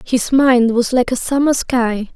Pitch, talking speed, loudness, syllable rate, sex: 245 Hz, 195 wpm, -15 LUFS, 3.9 syllables/s, female